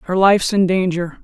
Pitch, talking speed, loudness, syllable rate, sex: 185 Hz, 195 wpm, -16 LUFS, 5.7 syllables/s, female